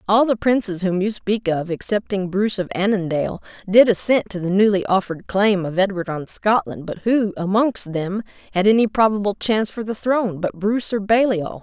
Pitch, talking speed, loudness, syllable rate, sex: 200 Hz, 190 wpm, -20 LUFS, 5.4 syllables/s, female